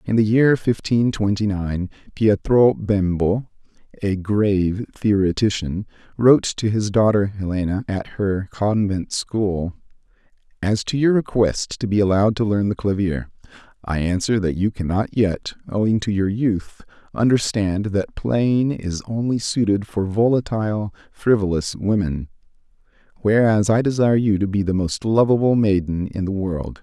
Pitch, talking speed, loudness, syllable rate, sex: 105 Hz, 145 wpm, -20 LUFS, 4.5 syllables/s, male